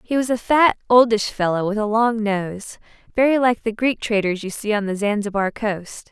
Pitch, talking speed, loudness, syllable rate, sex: 215 Hz, 205 wpm, -20 LUFS, 4.9 syllables/s, female